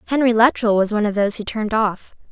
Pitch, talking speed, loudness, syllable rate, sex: 215 Hz, 235 wpm, -18 LUFS, 7.1 syllables/s, female